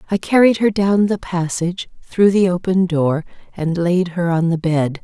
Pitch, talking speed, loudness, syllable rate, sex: 180 Hz, 190 wpm, -17 LUFS, 4.6 syllables/s, female